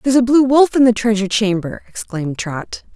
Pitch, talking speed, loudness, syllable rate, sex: 220 Hz, 205 wpm, -15 LUFS, 5.9 syllables/s, female